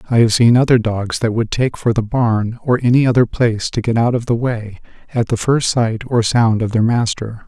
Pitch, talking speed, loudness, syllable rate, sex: 115 Hz, 240 wpm, -16 LUFS, 5.1 syllables/s, male